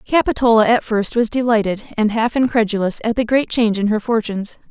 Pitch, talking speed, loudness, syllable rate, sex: 225 Hz, 190 wpm, -17 LUFS, 5.9 syllables/s, female